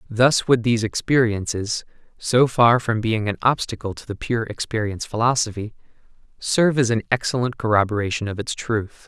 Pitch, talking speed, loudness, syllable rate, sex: 115 Hz, 150 wpm, -21 LUFS, 5.3 syllables/s, male